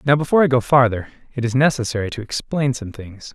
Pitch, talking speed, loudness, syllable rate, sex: 125 Hz, 215 wpm, -19 LUFS, 6.3 syllables/s, male